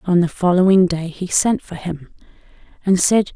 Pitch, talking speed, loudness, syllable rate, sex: 185 Hz, 180 wpm, -17 LUFS, 4.8 syllables/s, female